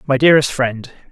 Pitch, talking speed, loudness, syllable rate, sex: 135 Hz, 160 wpm, -15 LUFS, 5.3 syllables/s, male